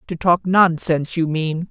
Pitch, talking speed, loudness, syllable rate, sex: 170 Hz, 175 wpm, -18 LUFS, 4.6 syllables/s, female